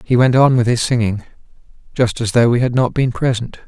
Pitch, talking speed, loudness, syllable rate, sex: 120 Hz, 230 wpm, -15 LUFS, 5.7 syllables/s, male